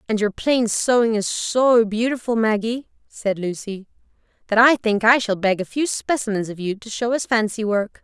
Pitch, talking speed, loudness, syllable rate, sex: 220 Hz, 195 wpm, -20 LUFS, 4.8 syllables/s, female